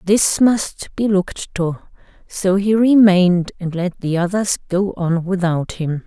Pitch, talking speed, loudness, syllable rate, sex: 185 Hz, 160 wpm, -17 LUFS, 4.0 syllables/s, female